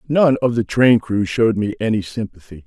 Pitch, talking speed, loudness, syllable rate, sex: 110 Hz, 200 wpm, -17 LUFS, 5.4 syllables/s, male